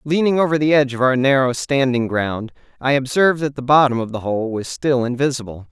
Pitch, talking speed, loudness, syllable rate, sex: 130 Hz, 210 wpm, -18 LUFS, 5.8 syllables/s, male